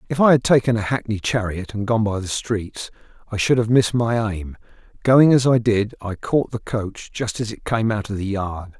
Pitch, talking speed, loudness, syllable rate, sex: 110 Hz, 230 wpm, -20 LUFS, 5.0 syllables/s, male